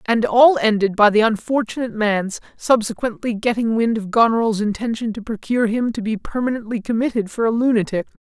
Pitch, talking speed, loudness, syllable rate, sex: 225 Hz, 170 wpm, -19 LUFS, 5.7 syllables/s, male